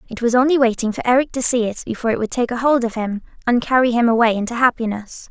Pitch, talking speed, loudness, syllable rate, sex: 235 Hz, 250 wpm, -18 LUFS, 6.6 syllables/s, female